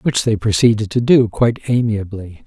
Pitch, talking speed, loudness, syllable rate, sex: 110 Hz, 170 wpm, -16 LUFS, 5.3 syllables/s, male